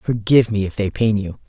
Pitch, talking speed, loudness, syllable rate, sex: 105 Hz, 245 wpm, -18 LUFS, 5.8 syllables/s, female